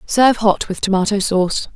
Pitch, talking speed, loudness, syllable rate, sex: 205 Hz, 170 wpm, -16 LUFS, 5.6 syllables/s, female